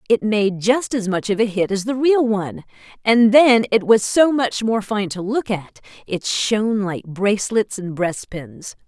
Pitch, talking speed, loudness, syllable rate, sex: 210 Hz, 190 wpm, -18 LUFS, 4.3 syllables/s, female